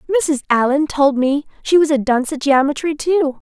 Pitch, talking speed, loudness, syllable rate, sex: 290 Hz, 190 wpm, -16 LUFS, 5.5 syllables/s, female